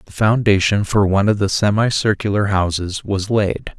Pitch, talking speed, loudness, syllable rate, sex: 100 Hz, 160 wpm, -17 LUFS, 5.0 syllables/s, male